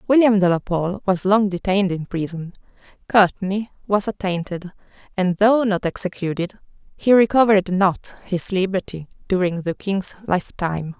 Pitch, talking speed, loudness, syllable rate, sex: 190 Hz, 135 wpm, -20 LUFS, 4.9 syllables/s, female